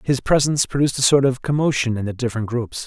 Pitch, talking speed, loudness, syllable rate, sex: 125 Hz, 230 wpm, -19 LUFS, 6.9 syllables/s, male